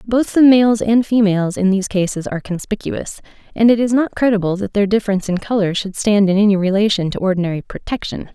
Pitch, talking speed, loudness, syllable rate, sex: 205 Hz, 200 wpm, -16 LUFS, 6.2 syllables/s, female